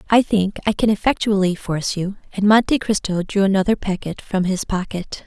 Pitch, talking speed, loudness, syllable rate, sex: 195 Hz, 180 wpm, -19 LUFS, 5.4 syllables/s, female